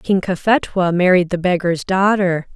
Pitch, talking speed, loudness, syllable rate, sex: 185 Hz, 140 wpm, -16 LUFS, 4.5 syllables/s, female